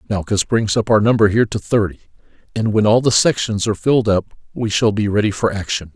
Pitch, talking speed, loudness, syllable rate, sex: 105 Hz, 220 wpm, -17 LUFS, 6.3 syllables/s, male